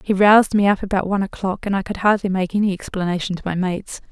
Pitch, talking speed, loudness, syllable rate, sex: 195 Hz, 250 wpm, -19 LUFS, 6.9 syllables/s, female